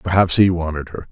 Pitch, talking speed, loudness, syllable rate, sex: 85 Hz, 215 wpm, -17 LUFS, 5.9 syllables/s, male